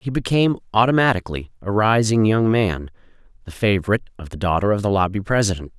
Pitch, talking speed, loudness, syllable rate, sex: 105 Hz, 165 wpm, -19 LUFS, 6.5 syllables/s, male